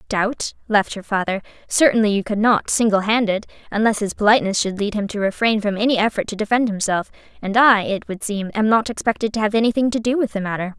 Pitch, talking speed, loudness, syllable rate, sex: 215 Hz, 220 wpm, -19 LUFS, 6.2 syllables/s, female